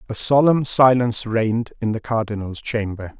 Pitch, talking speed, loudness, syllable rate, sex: 115 Hz, 150 wpm, -19 LUFS, 5.1 syllables/s, male